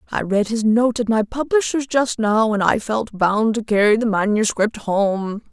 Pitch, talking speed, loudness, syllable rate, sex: 220 Hz, 195 wpm, -19 LUFS, 4.4 syllables/s, female